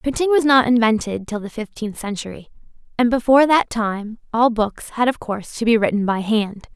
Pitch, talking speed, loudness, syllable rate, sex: 230 Hz, 195 wpm, -19 LUFS, 5.3 syllables/s, female